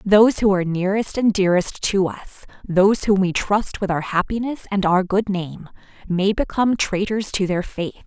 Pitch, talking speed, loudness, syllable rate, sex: 195 Hz, 185 wpm, -20 LUFS, 5.4 syllables/s, female